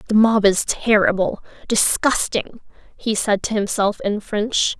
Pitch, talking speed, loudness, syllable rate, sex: 215 Hz, 125 wpm, -19 LUFS, 4.0 syllables/s, female